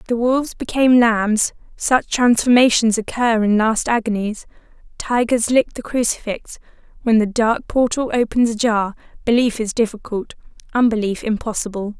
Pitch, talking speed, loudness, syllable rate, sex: 230 Hz, 120 wpm, -18 LUFS, 4.8 syllables/s, female